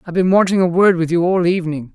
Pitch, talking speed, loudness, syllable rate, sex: 175 Hz, 275 wpm, -15 LUFS, 7.2 syllables/s, female